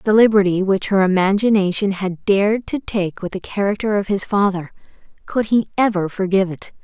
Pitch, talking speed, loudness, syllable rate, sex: 195 Hz, 165 wpm, -18 LUFS, 5.4 syllables/s, female